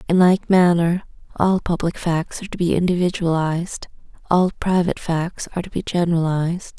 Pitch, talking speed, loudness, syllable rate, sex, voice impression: 175 Hz, 150 wpm, -20 LUFS, 5.6 syllables/s, female, feminine, adult-like, relaxed, slightly weak, soft, fluent, raspy, intellectual, calm, slightly reassuring, elegant, kind, modest